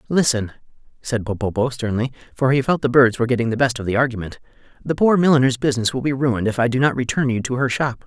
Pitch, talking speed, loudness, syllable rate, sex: 125 Hz, 240 wpm, -19 LUFS, 6.8 syllables/s, male